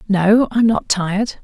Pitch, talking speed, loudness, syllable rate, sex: 205 Hz, 170 wpm, -16 LUFS, 4.1 syllables/s, female